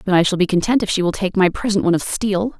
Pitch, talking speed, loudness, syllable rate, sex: 195 Hz, 325 wpm, -18 LUFS, 7.3 syllables/s, female